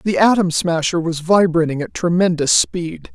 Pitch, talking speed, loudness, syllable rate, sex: 170 Hz, 155 wpm, -16 LUFS, 4.5 syllables/s, female